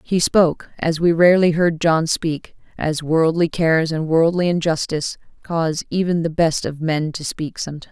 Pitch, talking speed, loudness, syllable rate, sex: 165 Hz, 165 wpm, -19 LUFS, 5.1 syllables/s, female